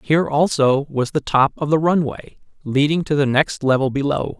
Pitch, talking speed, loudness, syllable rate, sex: 145 Hz, 190 wpm, -18 LUFS, 5.0 syllables/s, male